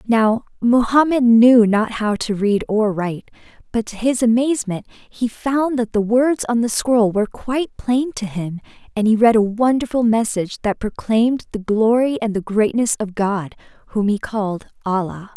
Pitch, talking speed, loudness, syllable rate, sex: 225 Hz, 175 wpm, -18 LUFS, 4.7 syllables/s, female